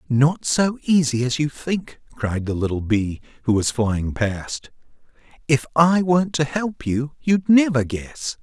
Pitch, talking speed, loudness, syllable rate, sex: 140 Hz, 165 wpm, -21 LUFS, 3.9 syllables/s, male